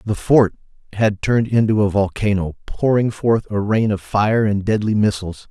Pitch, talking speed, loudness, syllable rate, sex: 105 Hz, 175 wpm, -18 LUFS, 4.9 syllables/s, male